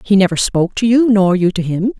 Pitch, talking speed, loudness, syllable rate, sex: 200 Hz, 270 wpm, -14 LUFS, 6.0 syllables/s, female